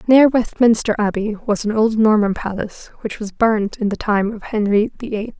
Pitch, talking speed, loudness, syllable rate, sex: 215 Hz, 200 wpm, -18 LUFS, 4.9 syllables/s, female